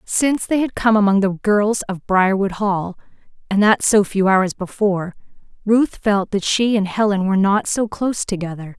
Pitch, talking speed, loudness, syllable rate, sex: 200 Hz, 170 wpm, -18 LUFS, 4.8 syllables/s, female